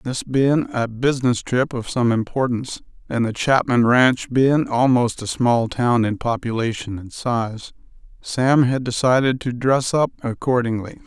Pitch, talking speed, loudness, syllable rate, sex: 125 Hz, 150 wpm, -20 LUFS, 4.3 syllables/s, male